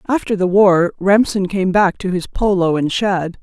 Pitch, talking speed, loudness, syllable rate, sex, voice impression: 190 Hz, 195 wpm, -16 LUFS, 4.4 syllables/s, female, feminine, adult-like, slightly relaxed, slightly dark, soft, slightly muffled, intellectual, calm, reassuring, slightly elegant, kind, slightly modest